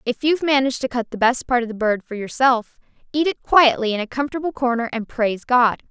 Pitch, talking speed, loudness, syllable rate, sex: 250 Hz, 235 wpm, -20 LUFS, 6.1 syllables/s, female